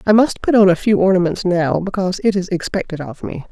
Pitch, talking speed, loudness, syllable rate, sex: 185 Hz, 240 wpm, -16 LUFS, 6.0 syllables/s, female